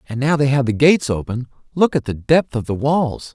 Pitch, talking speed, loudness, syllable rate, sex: 135 Hz, 250 wpm, -18 LUFS, 5.4 syllables/s, male